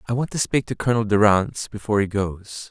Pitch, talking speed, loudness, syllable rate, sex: 110 Hz, 220 wpm, -21 LUFS, 6.2 syllables/s, male